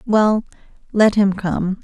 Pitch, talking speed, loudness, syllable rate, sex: 200 Hz, 130 wpm, -17 LUFS, 3.3 syllables/s, female